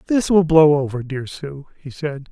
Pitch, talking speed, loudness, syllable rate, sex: 150 Hz, 205 wpm, -17 LUFS, 4.6 syllables/s, male